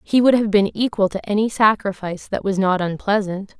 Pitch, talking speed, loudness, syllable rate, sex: 205 Hz, 200 wpm, -19 LUFS, 5.4 syllables/s, female